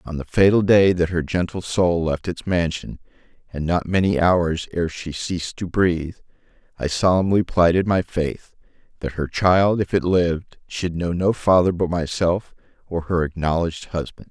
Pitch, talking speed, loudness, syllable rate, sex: 85 Hz, 170 wpm, -21 LUFS, 4.7 syllables/s, male